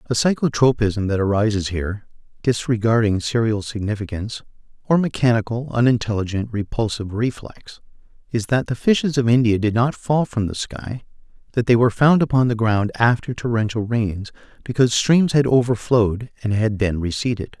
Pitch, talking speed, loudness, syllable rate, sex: 115 Hz, 140 wpm, -20 LUFS, 5.4 syllables/s, male